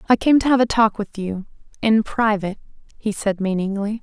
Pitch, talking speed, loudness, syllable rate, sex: 210 Hz, 180 wpm, -20 LUFS, 5.5 syllables/s, female